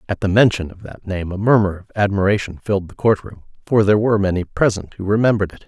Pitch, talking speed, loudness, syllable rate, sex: 100 Hz, 235 wpm, -18 LUFS, 6.7 syllables/s, male